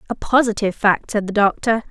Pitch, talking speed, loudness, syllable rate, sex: 215 Hz, 190 wpm, -18 LUFS, 6.0 syllables/s, female